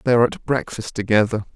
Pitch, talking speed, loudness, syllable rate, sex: 115 Hz, 195 wpm, -20 LUFS, 6.6 syllables/s, male